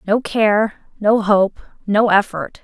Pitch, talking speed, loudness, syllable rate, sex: 210 Hz, 90 wpm, -17 LUFS, 3.2 syllables/s, female